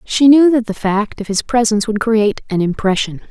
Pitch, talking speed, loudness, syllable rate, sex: 220 Hz, 220 wpm, -15 LUFS, 5.6 syllables/s, female